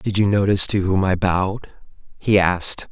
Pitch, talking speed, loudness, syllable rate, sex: 95 Hz, 185 wpm, -18 LUFS, 5.3 syllables/s, male